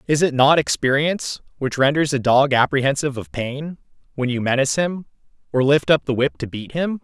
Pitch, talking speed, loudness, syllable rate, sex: 135 Hz, 195 wpm, -19 LUFS, 5.6 syllables/s, male